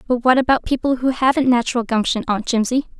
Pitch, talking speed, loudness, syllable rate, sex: 245 Hz, 200 wpm, -18 LUFS, 6.4 syllables/s, female